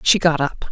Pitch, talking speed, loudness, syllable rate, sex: 160 Hz, 250 wpm, -18 LUFS, 5.0 syllables/s, female